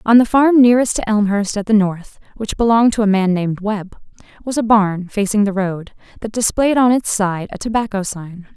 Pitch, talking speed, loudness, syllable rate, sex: 210 Hz, 210 wpm, -16 LUFS, 5.3 syllables/s, female